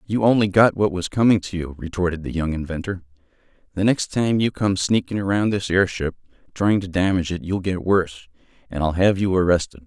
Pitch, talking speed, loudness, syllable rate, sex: 95 Hz, 200 wpm, -21 LUFS, 5.8 syllables/s, male